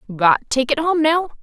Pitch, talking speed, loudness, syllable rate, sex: 280 Hz, 210 wpm, -17 LUFS, 5.6 syllables/s, female